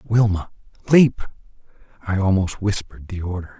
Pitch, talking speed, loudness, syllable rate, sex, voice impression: 100 Hz, 115 wpm, -20 LUFS, 5.1 syllables/s, male, very masculine, middle-aged, slightly thick, intellectual, calm, mature, reassuring